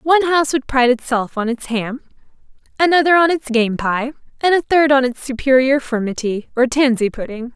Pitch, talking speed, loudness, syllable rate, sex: 260 Hz, 185 wpm, -16 LUFS, 5.4 syllables/s, female